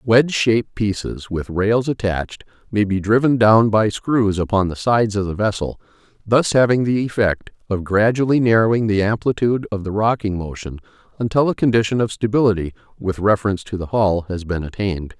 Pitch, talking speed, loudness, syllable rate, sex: 105 Hz, 175 wpm, -18 LUFS, 5.5 syllables/s, male